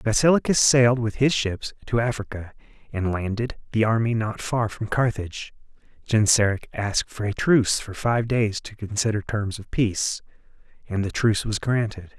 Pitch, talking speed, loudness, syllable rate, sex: 110 Hz, 165 wpm, -23 LUFS, 5.1 syllables/s, male